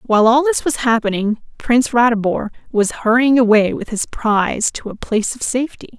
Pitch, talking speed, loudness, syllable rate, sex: 230 Hz, 180 wpm, -16 LUFS, 5.8 syllables/s, female